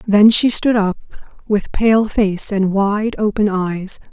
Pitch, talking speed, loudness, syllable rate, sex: 205 Hz, 160 wpm, -16 LUFS, 3.6 syllables/s, female